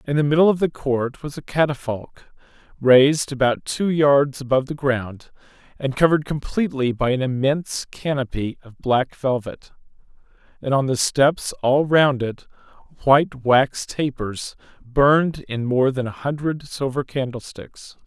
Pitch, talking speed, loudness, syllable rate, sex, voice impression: 135 Hz, 145 wpm, -20 LUFS, 4.6 syllables/s, male, very masculine, middle-aged, slightly thick, tensed, slightly powerful, very bright, soft, clear, fluent, slightly raspy, cool, intellectual, very refreshing, sincere, calm, mature, very friendly, very reassuring, unique, elegant, wild, slightly sweet, lively, very kind, slightly intense